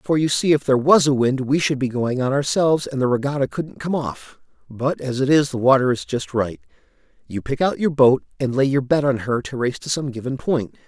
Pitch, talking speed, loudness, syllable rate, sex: 135 Hz, 255 wpm, -20 LUFS, 5.5 syllables/s, male